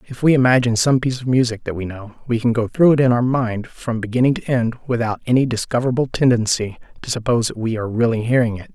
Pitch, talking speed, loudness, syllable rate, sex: 120 Hz, 235 wpm, -18 LUFS, 6.7 syllables/s, male